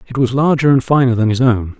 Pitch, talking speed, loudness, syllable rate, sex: 125 Hz, 265 wpm, -14 LUFS, 6.1 syllables/s, male